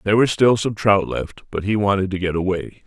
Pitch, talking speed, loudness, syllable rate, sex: 100 Hz, 250 wpm, -19 LUFS, 6.0 syllables/s, male